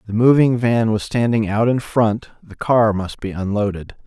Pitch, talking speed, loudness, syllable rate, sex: 110 Hz, 190 wpm, -18 LUFS, 4.6 syllables/s, male